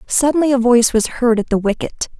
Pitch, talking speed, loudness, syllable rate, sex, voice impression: 245 Hz, 220 wpm, -15 LUFS, 6.0 syllables/s, female, feminine, adult-like, slightly relaxed, powerful, soft, fluent, slightly raspy, intellectual, calm, friendly, reassuring, elegant, lively, kind, slightly modest